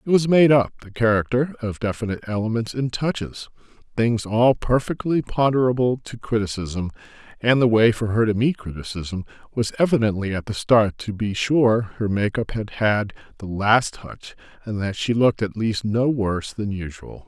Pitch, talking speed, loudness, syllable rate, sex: 115 Hz, 170 wpm, -21 LUFS, 4.9 syllables/s, male